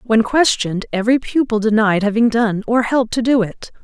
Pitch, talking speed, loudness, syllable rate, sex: 225 Hz, 190 wpm, -16 LUFS, 5.6 syllables/s, female